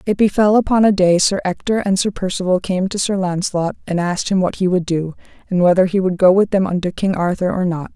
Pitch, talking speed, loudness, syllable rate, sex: 185 Hz, 250 wpm, -17 LUFS, 6.1 syllables/s, female